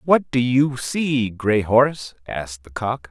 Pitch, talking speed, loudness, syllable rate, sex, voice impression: 120 Hz, 175 wpm, -20 LUFS, 3.8 syllables/s, male, masculine, old, thick, tensed, powerful, slightly soft, clear, halting, calm, mature, friendly, reassuring, wild, lively, kind, slightly strict